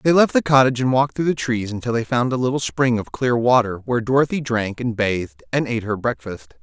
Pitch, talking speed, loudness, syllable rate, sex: 120 Hz, 245 wpm, -20 LUFS, 6.1 syllables/s, male